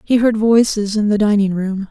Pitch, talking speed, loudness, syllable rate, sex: 210 Hz, 220 wpm, -15 LUFS, 5.0 syllables/s, female